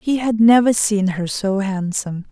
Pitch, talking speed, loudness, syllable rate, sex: 205 Hz, 180 wpm, -17 LUFS, 4.6 syllables/s, female